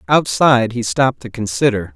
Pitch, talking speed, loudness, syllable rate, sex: 115 Hz, 155 wpm, -16 LUFS, 5.6 syllables/s, male